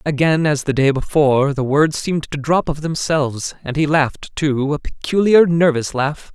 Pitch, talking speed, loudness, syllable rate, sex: 150 Hz, 190 wpm, -17 LUFS, 4.9 syllables/s, male